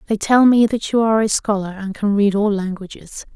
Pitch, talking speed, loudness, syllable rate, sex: 210 Hz, 235 wpm, -17 LUFS, 5.6 syllables/s, female